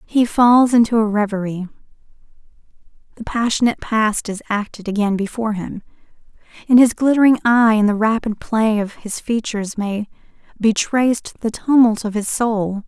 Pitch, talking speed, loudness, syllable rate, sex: 220 Hz, 150 wpm, -17 LUFS, 5.0 syllables/s, female